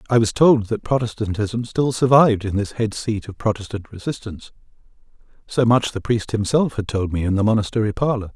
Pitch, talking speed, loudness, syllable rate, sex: 110 Hz, 185 wpm, -20 LUFS, 5.7 syllables/s, male